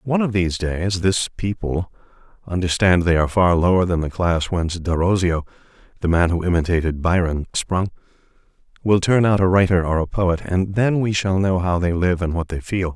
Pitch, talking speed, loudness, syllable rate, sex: 90 Hz, 185 wpm, -19 LUFS, 5.4 syllables/s, male